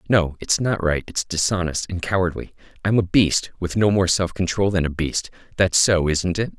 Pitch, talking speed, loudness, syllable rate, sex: 90 Hz, 200 wpm, -21 LUFS, 5.0 syllables/s, male